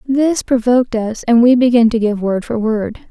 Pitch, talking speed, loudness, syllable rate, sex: 235 Hz, 215 wpm, -14 LUFS, 4.8 syllables/s, female